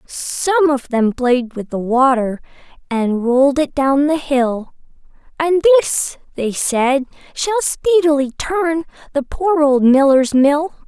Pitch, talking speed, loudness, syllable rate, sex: 280 Hz, 140 wpm, -16 LUFS, 3.5 syllables/s, female